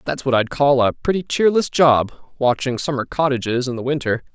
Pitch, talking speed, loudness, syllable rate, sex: 135 Hz, 180 wpm, -19 LUFS, 5.5 syllables/s, male